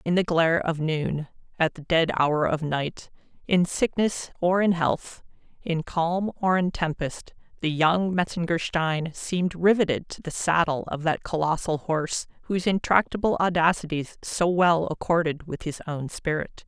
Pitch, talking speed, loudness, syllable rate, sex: 165 Hz, 140 wpm, -25 LUFS, 4.5 syllables/s, female